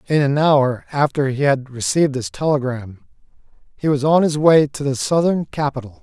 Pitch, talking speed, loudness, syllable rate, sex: 140 Hz, 180 wpm, -18 LUFS, 5.0 syllables/s, male